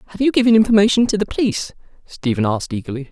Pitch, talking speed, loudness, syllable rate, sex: 195 Hz, 190 wpm, -17 LUFS, 7.7 syllables/s, male